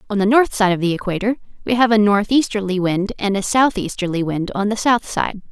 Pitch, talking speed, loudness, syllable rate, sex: 205 Hz, 220 wpm, -18 LUFS, 5.7 syllables/s, female